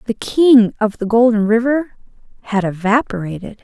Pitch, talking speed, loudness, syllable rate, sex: 225 Hz, 130 wpm, -15 LUFS, 4.9 syllables/s, female